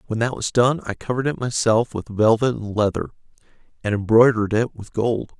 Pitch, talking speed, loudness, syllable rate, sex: 115 Hz, 190 wpm, -20 LUFS, 5.7 syllables/s, male